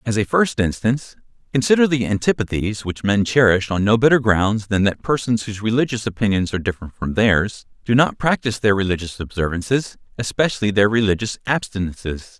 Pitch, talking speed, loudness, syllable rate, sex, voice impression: 110 Hz, 165 wpm, -19 LUFS, 5.9 syllables/s, male, masculine, adult-like, fluent, cool, slightly intellectual, refreshing, slightly friendly